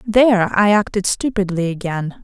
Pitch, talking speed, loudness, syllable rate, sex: 200 Hz, 135 wpm, -17 LUFS, 4.8 syllables/s, female